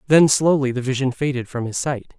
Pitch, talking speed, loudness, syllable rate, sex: 135 Hz, 220 wpm, -20 LUFS, 5.5 syllables/s, male